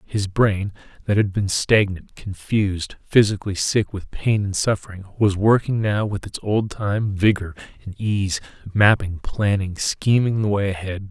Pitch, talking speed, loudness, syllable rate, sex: 100 Hz, 155 wpm, -21 LUFS, 4.4 syllables/s, male